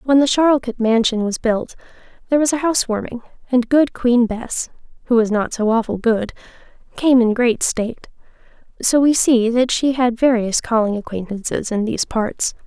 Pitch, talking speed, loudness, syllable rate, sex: 240 Hz, 170 wpm, -18 LUFS, 4.8 syllables/s, female